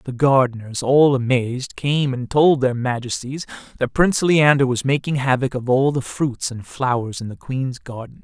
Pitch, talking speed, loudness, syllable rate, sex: 130 Hz, 180 wpm, -19 LUFS, 4.7 syllables/s, male